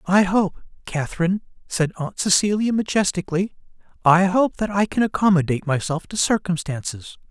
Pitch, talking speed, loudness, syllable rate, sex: 185 Hz, 125 wpm, -21 LUFS, 5.4 syllables/s, male